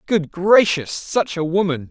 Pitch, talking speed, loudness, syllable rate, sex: 180 Hz, 160 wpm, -18 LUFS, 4.0 syllables/s, male